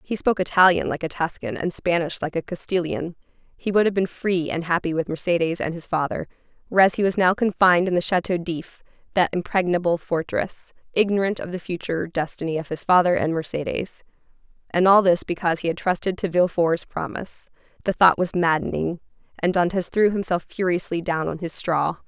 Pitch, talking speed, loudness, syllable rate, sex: 175 Hz, 185 wpm, -22 LUFS, 5.8 syllables/s, female